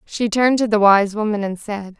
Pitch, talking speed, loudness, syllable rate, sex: 210 Hz, 240 wpm, -17 LUFS, 5.3 syllables/s, female